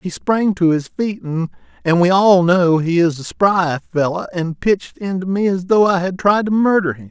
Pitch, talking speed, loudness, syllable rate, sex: 175 Hz, 220 wpm, -16 LUFS, 4.6 syllables/s, male